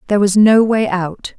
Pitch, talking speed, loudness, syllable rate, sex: 205 Hz, 215 wpm, -13 LUFS, 5.1 syllables/s, female